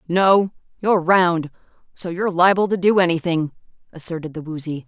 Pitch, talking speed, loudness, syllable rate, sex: 175 Hz, 150 wpm, -19 LUFS, 5.5 syllables/s, female